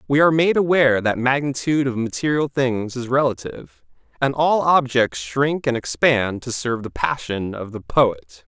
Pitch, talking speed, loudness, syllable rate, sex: 130 Hz, 170 wpm, -20 LUFS, 4.9 syllables/s, male